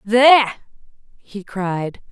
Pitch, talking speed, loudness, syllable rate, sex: 215 Hz, 85 wpm, -16 LUFS, 2.9 syllables/s, female